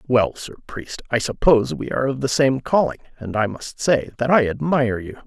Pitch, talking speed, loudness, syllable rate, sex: 125 Hz, 215 wpm, -20 LUFS, 5.5 syllables/s, male